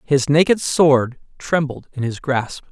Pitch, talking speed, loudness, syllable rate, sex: 140 Hz, 155 wpm, -18 LUFS, 3.8 syllables/s, male